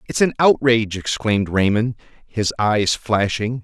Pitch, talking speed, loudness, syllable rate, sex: 110 Hz, 130 wpm, -18 LUFS, 4.6 syllables/s, male